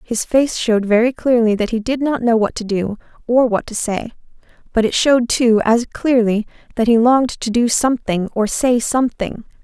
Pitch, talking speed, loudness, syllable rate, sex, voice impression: 230 Hz, 200 wpm, -16 LUFS, 5.2 syllables/s, female, feminine, adult-like, tensed, powerful, bright, soft, clear, fluent, intellectual, calm, friendly, reassuring, elegant, lively, kind